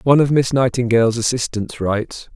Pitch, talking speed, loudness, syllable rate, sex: 120 Hz, 155 wpm, -17 LUFS, 5.8 syllables/s, male